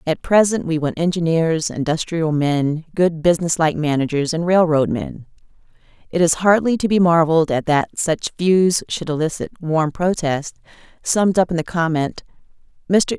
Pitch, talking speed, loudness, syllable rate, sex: 165 Hz, 155 wpm, -18 LUFS, 4.8 syllables/s, female